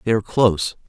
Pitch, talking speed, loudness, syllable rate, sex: 105 Hz, 205 wpm, -19 LUFS, 7.4 syllables/s, male